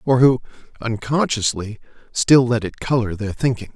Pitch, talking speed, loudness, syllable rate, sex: 115 Hz, 110 wpm, -19 LUFS, 4.8 syllables/s, male